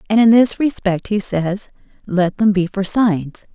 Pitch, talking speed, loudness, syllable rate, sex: 200 Hz, 185 wpm, -16 LUFS, 4.1 syllables/s, female